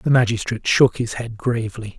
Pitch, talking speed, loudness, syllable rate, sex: 115 Hz, 180 wpm, -20 LUFS, 5.6 syllables/s, male